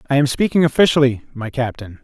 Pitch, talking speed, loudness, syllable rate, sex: 135 Hz, 175 wpm, -17 LUFS, 6.2 syllables/s, male